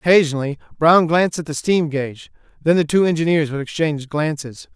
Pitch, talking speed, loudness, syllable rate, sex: 155 Hz, 175 wpm, -18 LUFS, 6.0 syllables/s, male